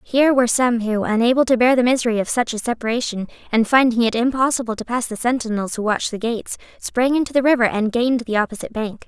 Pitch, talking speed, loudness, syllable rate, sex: 235 Hz, 225 wpm, -19 LUFS, 6.7 syllables/s, female